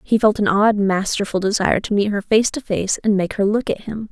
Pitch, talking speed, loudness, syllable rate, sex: 205 Hz, 260 wpm, -18 LUFS, 5.5 syllables/s, female